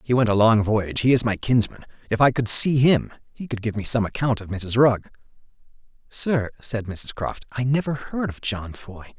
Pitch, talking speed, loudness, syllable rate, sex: 115 Hz, 215 wpm, -22 LUFS, 5.0 syllables/s, male